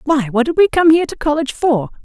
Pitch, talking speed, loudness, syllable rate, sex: 290 Hz, 265 wpm, -15 LUFS, 6.8 syllables/s, female